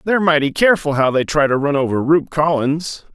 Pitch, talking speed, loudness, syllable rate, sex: 150 Hz, 210 wpm, -16 LUFS, 5.7 syllables/s, male